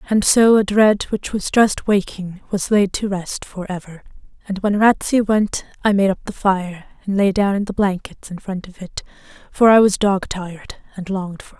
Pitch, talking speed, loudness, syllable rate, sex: 195 Hz, 215 wpm, -18 LUFS, 4.9 syllables/s, female